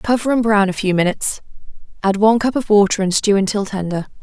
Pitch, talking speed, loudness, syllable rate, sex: 205 Hz, 215 wpm, -17 LUFS, 6.3 syllables/s, female